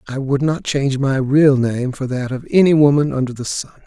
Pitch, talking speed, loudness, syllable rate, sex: 135 Hz, 235 wpm, -17 LUFS, 5.4 syllables/s, male